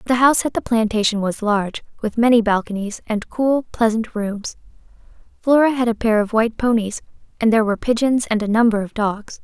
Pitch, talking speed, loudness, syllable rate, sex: 225 Hz, 190 wpm, -19 LUFS, 5.7 syllables/s, female